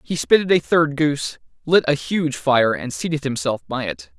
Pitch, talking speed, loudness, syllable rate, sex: 150 Hz, 200 wpm, -20 LUFS, 4.9 syllables/s, male